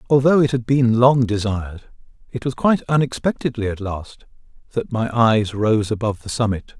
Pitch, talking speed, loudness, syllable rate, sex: 120 Hz, 170 wpm, -19 LUFS, 5.2 syllables/s, male